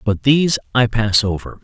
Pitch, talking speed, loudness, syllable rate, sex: 115 Hz, 185 wpm, -16 LUFS, 5.0 syllables/s, male